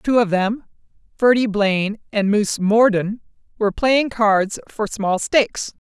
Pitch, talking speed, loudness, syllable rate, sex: 215 Hz, 145 wpm, -19 LUFS, 4.3 syllables/s, female